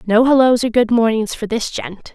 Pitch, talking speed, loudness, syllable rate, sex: 230 Hz, 225 wpm, -15 LUFS, 4.9 syllables/s, female